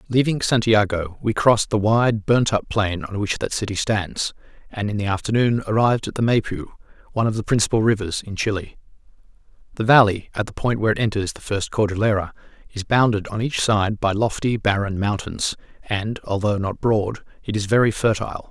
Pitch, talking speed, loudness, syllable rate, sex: 105 Hz, 185 wpm, -21 LUFS, 5.6 syllables/s, male